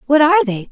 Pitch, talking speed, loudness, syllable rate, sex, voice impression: 275 Hz, 250 wpm, -13 LUFS, 7.3 syllables/s, female, very feminine, young, thin, tensed, slightly powerful, bright, soft, clear, fluent, slightly raspy, very cute, intellectual, very refreshing, sincere, slightly calm, very friendly, very reassuring, very unique, elegant, wild, very sweet, very lively, very kind, slightly intense, very light